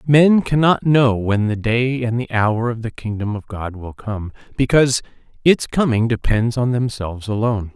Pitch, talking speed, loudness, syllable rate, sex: 115 Hz, 180 wpm, -18 LUFS, 4.8 syllables/s, male